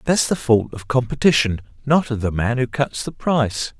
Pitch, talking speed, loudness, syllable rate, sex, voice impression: 125 Hz, 205 wpm, -20 LUFS, 5.0 syllables/s, male, very masculine, very adult-like, middle-aged, very thick, tensed, very powerful, bright, hard, very clear, fluent, slightly raspy, very cool, very intellectual, slightly refreshing, very sincere, very calm, mature, very friendly, very reassuring, unique, very elegant, slightly wild, very sweet, slightly lively, very kind, slightly modest